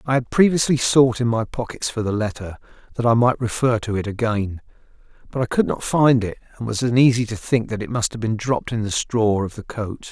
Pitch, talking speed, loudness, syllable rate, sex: 115 Hz, 235 wpm, -20 LUFS, 5.6 syllables/s, male